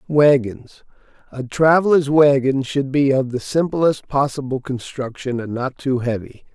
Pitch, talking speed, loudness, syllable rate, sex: 135 Hz, 130 wpm, -18 LUFS, 4.3 syllables/s, male